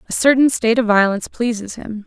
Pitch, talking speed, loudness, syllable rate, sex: 230 Hz, 205 wpm, -16 LUFS, 6.2 syllables/s, female